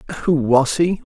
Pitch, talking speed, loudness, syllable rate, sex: 150 Hz, 165 wpm, -17 LUFS, 6.0 syllables/s, male